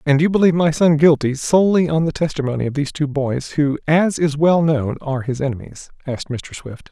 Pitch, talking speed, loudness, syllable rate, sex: 150 Hz, 215 wpm, -18 LUFS, 5.9 syllables/s, male